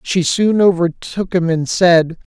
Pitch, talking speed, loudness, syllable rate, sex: 175 Hz, 155 wpm, -15 LUFS, 3.8 syllables/s, male